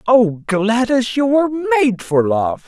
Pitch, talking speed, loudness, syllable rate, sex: 230 Hz, 155 wpm, -16 LUFS, 4.1 syllables/s, male